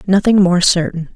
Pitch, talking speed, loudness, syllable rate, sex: 180 Hz, 155 wpm, -13 LUFS, 5.1 syllables/s, female